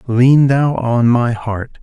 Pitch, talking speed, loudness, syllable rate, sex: 125 Hz, 165 wpm, -14 LUFS, 3.0 syllables/s, male